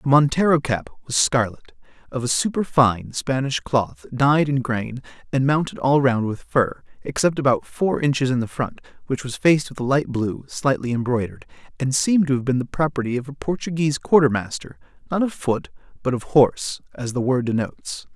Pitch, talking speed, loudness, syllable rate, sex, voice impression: 135 Hz, 185 wpm, -21 LUFS, 5.4 syllables/s, male, masculine, adult-like, slightly thick, tensed, slightly powerful, bright, hard, clear, fluent, slightly raspy, cool, intellectual, very refreshing, very sincere, slightly calm, friendly, reassuring, very unique, slightly elegant, wild, slightly sweet, very lively, kind, slightly intense